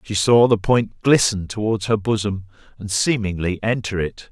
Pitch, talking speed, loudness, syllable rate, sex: 105 Hz, 165 wpm, -19 LUFS, 4.8 syllables/s, male